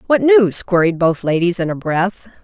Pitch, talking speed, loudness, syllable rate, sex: 180 Hz, 195 wpm, -15 LUFS, 4.6 syllables/s, female